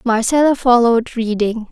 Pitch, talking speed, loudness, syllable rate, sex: 235 Hz, 105 wpm, -15 LUFS, 5.2 syllables/s, female